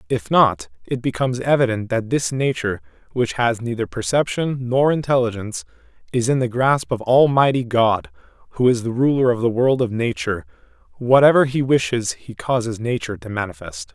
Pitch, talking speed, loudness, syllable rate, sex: 125 Hz, 165 wpm, -19 LUFS, 5.4 syllables/s, male